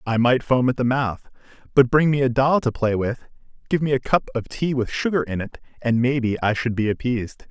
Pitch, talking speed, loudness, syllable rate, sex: 125 Hz, 240 wpm, -21 LUFS, 5.5 syllables/s, male